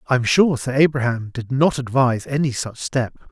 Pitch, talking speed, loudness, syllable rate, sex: 130 Hz, 180 wpm, -19 LUFS, 5.0 syllables/s, male